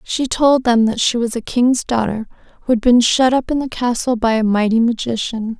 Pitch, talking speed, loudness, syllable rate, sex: 235 Hz, 225 wpm, -16 LUFS, 5.1 syllables/s, female